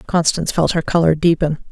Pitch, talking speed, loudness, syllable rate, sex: 160 Hz, 175 wpm, -16 LUFS, 5.9 syllables/s, female